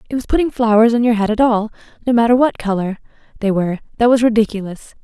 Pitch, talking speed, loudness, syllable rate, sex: 225 Hz, 215 wpm, -16 LUFS, 6.9 syllables/s, female